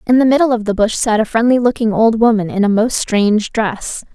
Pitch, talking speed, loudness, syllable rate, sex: 225 Hz, 245 wpm, -14 LUFS, 5.6 syllables/s, female